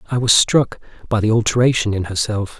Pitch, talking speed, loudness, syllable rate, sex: 110 Hz, 185 wpm, -17 LUFS, 5.8 syllables/s, male